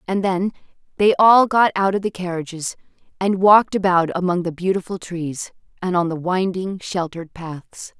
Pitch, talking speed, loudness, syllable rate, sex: 185 Hz, 165 wpm, -19 LUFS, 4.9 syllables/s, female